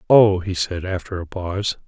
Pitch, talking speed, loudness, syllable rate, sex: 95 Hz, 190 wpm, -21 LUFS, 4.9 syllables/s, male